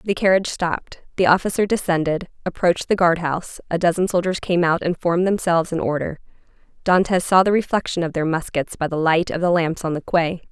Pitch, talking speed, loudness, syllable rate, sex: 175 Hz, 200 wpm, -20 LUFS, 6.1 syllables/s, female